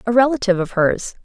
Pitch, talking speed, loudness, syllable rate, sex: 215 Hz, 195 wpm, -17 LUFS, 6.6 syllables/s, female